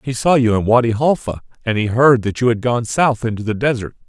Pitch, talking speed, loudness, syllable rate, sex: 120 Hz, 250 wpm, -16 LUFS, 5.8 syllables/s, male